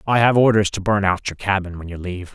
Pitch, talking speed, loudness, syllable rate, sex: 100 Hz, 280 wpm, -19 LUFS, 6.3 syllables/s, male